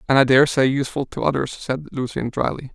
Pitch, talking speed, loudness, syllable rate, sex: 135 Hz, 195 wpm, -20 LUFS, 6.2 syllables/s, male